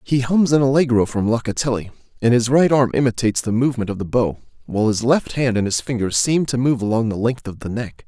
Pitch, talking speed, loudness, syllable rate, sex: 120 Hz, 240 wpm, -19 LUFS, 6.1 syllables/s, male